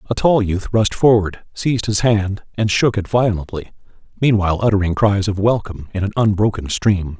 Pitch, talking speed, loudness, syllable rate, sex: 100 Hz, 175 wpm, -17 LUFS, 5.4 syllables/s, male